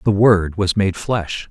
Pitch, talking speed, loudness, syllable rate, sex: 100 Hz, 200 wpm, -17 LUFS, 3.6 syllables/s, male